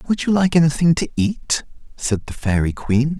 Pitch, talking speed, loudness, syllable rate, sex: 145 Hz, 190 wpm, -19 LUFS, 4.6 syllables/s, male